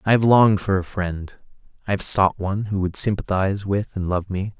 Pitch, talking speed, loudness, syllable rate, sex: 100 Hz, 220 wpm, -21 LUFS, 5.6 syllables/s, male